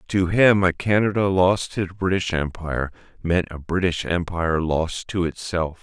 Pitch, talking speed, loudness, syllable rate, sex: 90 Hz, 165 wpm, -22 LUFS, 4.7 syllables/s, male